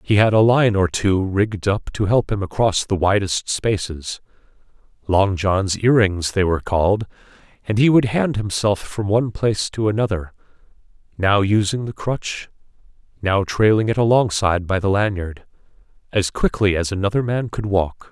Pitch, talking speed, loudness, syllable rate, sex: 100 Hz, 160 wpm, -19 LUFS, 4.9 syllables/s, male